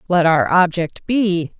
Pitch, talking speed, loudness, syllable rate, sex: 175 Hz, 150 wpm, -17 LUFS, 3.9 syllables/s, female